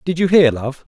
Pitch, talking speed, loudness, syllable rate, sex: 155 Hz, 250 wpm, -14 LUFS, 5.1 syllables/s, male